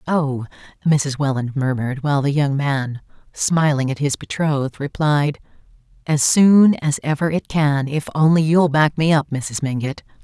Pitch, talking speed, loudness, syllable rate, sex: 145 Hz, 160 wpm, -18 LUFS, 4.5 syllables/s, female